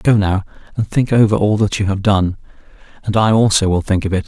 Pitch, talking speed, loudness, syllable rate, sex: 100 Hz, 240 wpm, -15 LUFS, 5.8 syllables/s, male